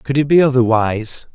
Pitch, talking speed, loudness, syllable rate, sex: 125 Hz, 180 wpm, -15 LUFS, 5.5 syllables/s, male